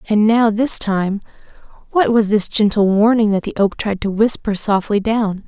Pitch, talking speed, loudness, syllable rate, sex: 215 Hz, 185 wpm, -16 LUFS, 4.6 syllables/s, female